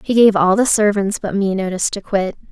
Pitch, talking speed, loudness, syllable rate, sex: 200 Hz, 240 wpm, -16 LUFS, 5.7 syllables/s, female